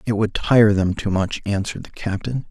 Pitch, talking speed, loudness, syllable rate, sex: 105 Hz, 215 wpm, -20 LUFS, 5.2 syllables/s, male